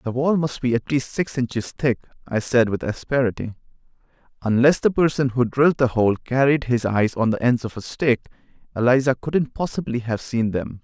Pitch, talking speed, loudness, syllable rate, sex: 125 Hz, 195 wpm, -21 LUFS, 5.2 syllables/s, male